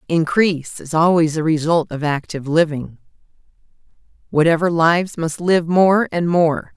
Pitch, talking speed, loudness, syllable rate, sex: 165 Hz, 135 wpm, -17 LUFS, 4.8 syllables/s, female